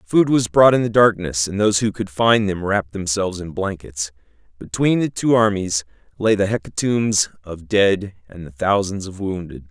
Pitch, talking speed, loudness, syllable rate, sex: 100 Hz, 185 wpm, -19 LUFS, 4.9 syllables/s, male